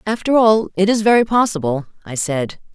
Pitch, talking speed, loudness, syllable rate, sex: 195 Hz, 175 wpm, -16 LUFS, 5.3 syllables/s, female